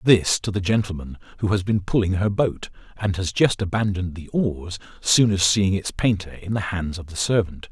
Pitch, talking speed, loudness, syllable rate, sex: 95 Hz, 210 wpm, -22 LUFS, 5.1 syllables/s, male